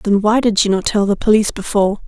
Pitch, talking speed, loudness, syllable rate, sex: 205 Hz, 260 wpm, -15 LUFS, 6.4 syllables/s, female